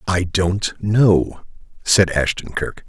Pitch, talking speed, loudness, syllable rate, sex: 95 Hz, 125 wpm, -18 LUFS, 3.0 syllables/s, male